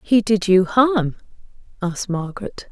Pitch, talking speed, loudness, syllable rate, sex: 200 Hz, 135 wpm, -19 LUFS, 4.6 syllables/s, female